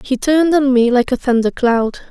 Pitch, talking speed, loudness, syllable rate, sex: 260 Hz, 230 wpm, -14 LUFS, 5.2 syllables/s, female